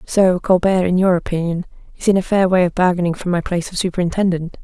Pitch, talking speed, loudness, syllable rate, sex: 180 Hz, 220 wpm, -17 LUFS, 6.5 syllables/s, female